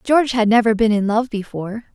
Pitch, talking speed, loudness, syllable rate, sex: 225 Hz, 215 wpm, -17 LUFS, 6.2 syllables/s, female